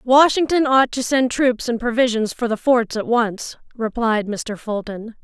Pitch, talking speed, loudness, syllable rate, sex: 240 Hz, 170 wpm, -19 LUFS, 4.3 syllables/s, female